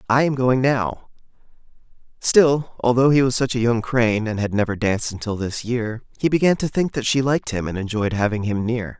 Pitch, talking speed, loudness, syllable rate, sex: 120 Hz, 215 wpm, -20 LUFS, 5.5 syllables/s, male